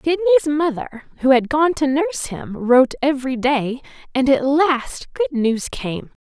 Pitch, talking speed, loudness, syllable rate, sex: 275 Hz, 165 wpm, -18 LUFS, 5.1 syllables/s, female